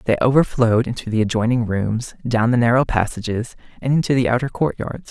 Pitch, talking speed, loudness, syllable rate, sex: 120 Hz, 165 wpm, -19 LUFS, 5.7 syllables/s, male